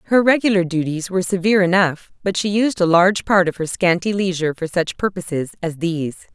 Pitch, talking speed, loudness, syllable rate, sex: 180 Hz, 200 wpm, -18 LUFS, 6.1 syllables/s, female